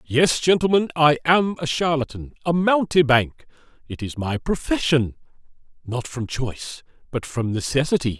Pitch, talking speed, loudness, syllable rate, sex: 145 Hz, 125 wpm, -21 LUFS, 4.7 syllables/s, male